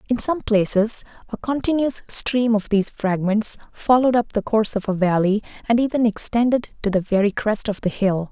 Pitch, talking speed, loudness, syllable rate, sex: 220 Hz, 190 wpm, -20 LUFS, 5.3 syllables/s, female